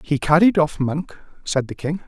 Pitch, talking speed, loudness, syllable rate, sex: 160 Hz, 200 wpm, -20 LUFS, 4.7 syllables/s, male